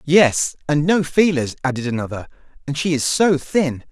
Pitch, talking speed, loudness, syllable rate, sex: 150 Hz, 170 wpm, -19 LUFS, 4.7 syllables/s, male